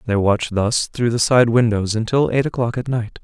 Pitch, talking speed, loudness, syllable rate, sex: 115 Hz, 225 wpm, -18 LUFS, 5.3 syllables/s, male